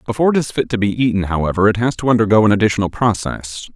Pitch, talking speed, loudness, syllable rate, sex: 110 Hz, 240 wpm, -16 LUFS, 7.3 syllables/s, male